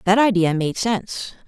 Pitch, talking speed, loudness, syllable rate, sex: 195 Hz, 165 wpm, -20 LUFS, 4.9 syllables/s, female